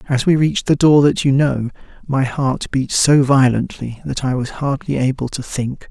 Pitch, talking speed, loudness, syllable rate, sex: 135 Hz, 205 wpm, -17 LUFS, 4.7 syllables/s, male